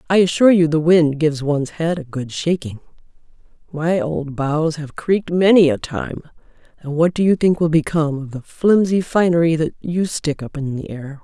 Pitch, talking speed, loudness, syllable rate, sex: 160 Hz, 200 wpm, -18 LUFS, 5.2 syllables/s, female